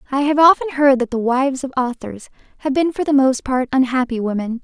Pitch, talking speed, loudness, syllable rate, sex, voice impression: 265 Hz, 220 wpm, -17 LUFS, 5.8 syllables/s, female, feminine, slightly adult-like, slightly soft, cute, slightly calm, friendly, slightly kind